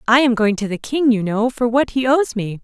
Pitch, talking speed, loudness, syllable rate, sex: 235 Hz, 295 wpm, -17 LUFS, 5.3 syllables/s, female